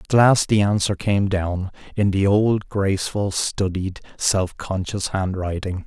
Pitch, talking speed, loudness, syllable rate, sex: 100 Hz, 145 wpm, -21 LUFS, 4.0 syllables/s, male